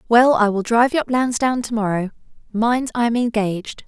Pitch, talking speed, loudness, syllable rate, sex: 230 Hz, 185 wpm, -19 LUFS, 5.6 syllables/s, female